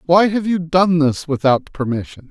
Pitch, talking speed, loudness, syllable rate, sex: 160 Hz, 180 wpm, -17 LUFS, 4.6 syllables/s, male